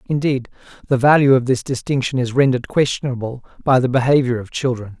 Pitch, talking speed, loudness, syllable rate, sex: 130 Hz, 170 wpm, -18 LUFS, 6.2 syllables/s, male